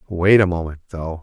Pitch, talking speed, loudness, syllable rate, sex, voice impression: 90 Hz, 195 wpm, -17 LUFS, 5.3 syllables/s, male, masculine, adult-like, tensed, powerful, hard, clear, intellectual, wild, lively, slightly strict